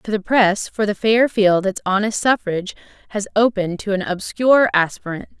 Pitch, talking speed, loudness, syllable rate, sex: 205 Hz, 180 wpm, -18 LUFS, 5.3 syllables/s, female